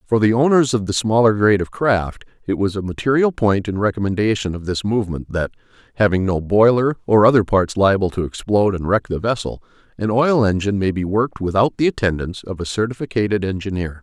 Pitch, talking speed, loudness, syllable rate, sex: 105 Hz, 195 wpm, -18 LUFS, 6.0 syllables/s, male